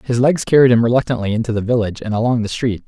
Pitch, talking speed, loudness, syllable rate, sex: 115 Hz, 250 wpm, -16 LUFS, 7.3 syllables/s, male